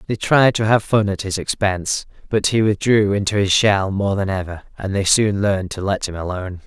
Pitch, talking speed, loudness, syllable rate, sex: 100 Hz, 225 wpm, -18 LUFS, 5.4 syllables/s, male